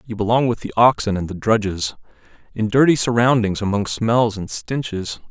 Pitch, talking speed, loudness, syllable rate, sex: 110 Hz, 170 wpm, -19 LUFS, 5.1 syllables/s, male